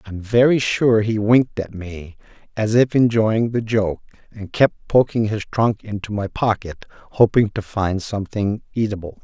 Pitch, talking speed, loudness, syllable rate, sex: 105 Hz, 160 wpm, -19 LUFS, 4.7 syllables/s, male